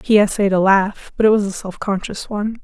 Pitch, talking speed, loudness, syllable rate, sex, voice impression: 200 Hz, 250 wpm, -17 LUFS, 5.7 syllables/s, female, feminine, adult-like, relaxed, slightly weak, soft, raspy, intellectual, slightly calm, friendly, elegant, slightly kind, slightly modest